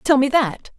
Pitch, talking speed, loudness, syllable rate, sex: 265 Hz, 230 wpm, -18 LUFS, 4.2 syllables/s, female